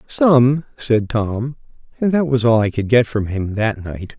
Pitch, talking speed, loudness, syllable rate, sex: 120 Hz, 200 wpm, -17 LUFS, 4.0 syllables/s, male